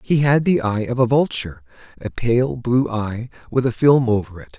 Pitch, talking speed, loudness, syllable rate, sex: 120 Hz, 195 wpm, -19 LUFS, 4.9 syllables/s, male